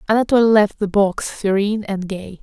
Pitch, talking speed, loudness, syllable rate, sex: 205 Hz, 175 wpm, -18 LUFS, 5.3 syllables/s, female